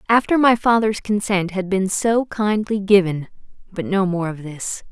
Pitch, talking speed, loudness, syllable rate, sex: 200 Hz, 160 wpm, -19 LUFS, 4.5 syllables/s, female